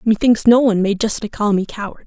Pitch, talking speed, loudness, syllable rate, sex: 215 Hz, 230 wpm, -16 LUFS, 6.2 syllables/s, female